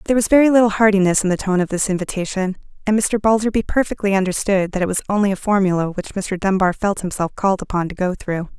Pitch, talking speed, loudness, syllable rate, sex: 195 Hz, 225 wpm, -18 LUFS, 6.7 syllables/s, female